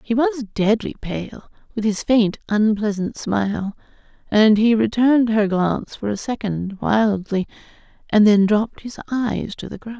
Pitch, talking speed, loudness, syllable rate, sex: 215 Hz, 155 wpm, -19 LUFS, 4.4 syllables/s, female